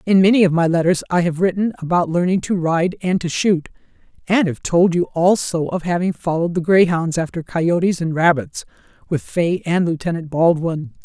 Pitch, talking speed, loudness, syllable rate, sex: 170 Hz, 185 wpm, -18 LUFS, 5.2 syllables/s, female